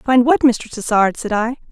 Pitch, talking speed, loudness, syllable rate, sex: 235 Hz, 210 wpm, -16 LUFS, 4.5 syllables/s, female